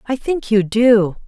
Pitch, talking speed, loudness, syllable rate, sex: 225 Hz, 190 wpm, -15 LUFS, 3.7 syllables/s, female